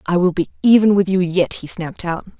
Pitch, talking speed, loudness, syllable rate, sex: 180 Hz, 250 wpm, -17 LUFS, 5.8 syllables/s, female